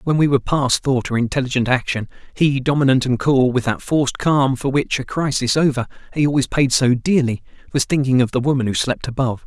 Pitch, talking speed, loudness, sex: 130 Hz, 215 wpm, -18 LUFS, male